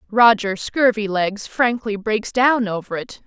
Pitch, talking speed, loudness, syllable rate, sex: 215 Hz, 130 wpm, -19 LUFS, 4.0 syllables/s, female